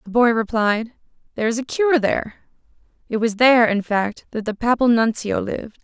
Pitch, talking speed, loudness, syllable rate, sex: 230 Hz, 185 wpm, -19 LUFS, 5.4 syllables/s, female